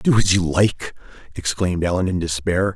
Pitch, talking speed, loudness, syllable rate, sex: 90 Hz, 175 wpm, -20 LUFS, 5.2 syllables/s, male